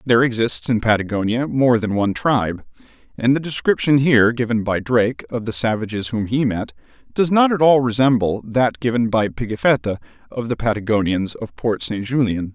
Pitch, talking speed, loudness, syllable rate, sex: 115 Hz, 175 wpm, -19 LUFS, 5.5 syllables/s, male